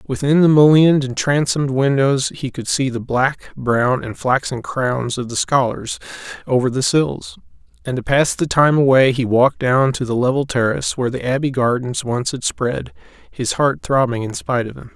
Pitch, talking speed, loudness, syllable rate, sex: 130 Hz, 195 wpm, -17 LUFS, 5.0 syllables/s, male